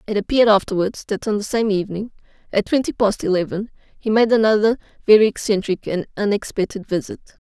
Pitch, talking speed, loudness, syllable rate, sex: 210 Hz, 160 wpm, -19 LUFS, 6.2 syllables/s, female